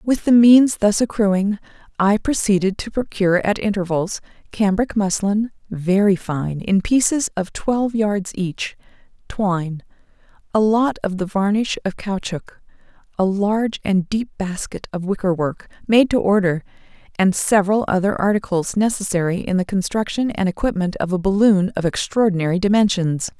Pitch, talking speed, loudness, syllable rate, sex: 200 Hz, 145 wpm, -19 LUFS, 4.8 syllables/s, female